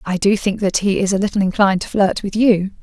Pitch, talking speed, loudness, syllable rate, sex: 195 Hz, 275 wpm, -17 LUFS, 6.0 syllables/s, female